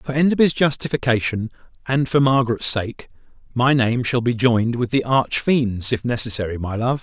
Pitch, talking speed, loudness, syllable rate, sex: 120 Hz, 170 wpm, -20 LUFS, 5.2 syllables/s, male